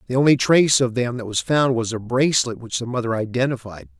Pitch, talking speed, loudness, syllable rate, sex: 125 Hz, 225 wpm, -20 LUFS, 6.2 syllables/s, male